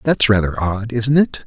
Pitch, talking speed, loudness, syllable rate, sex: 115 Hz, 205 wpm, -17 LUFS, 4.6 syllables/s, male